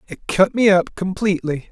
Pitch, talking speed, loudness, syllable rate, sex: 190 Hz, 175 wpm, -18 LUFS, 5.2 syllables/s, male